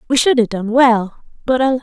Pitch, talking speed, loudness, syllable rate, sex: 240 Hz, 230 wpm, -15 LUFS, 5.6 syllables/s, female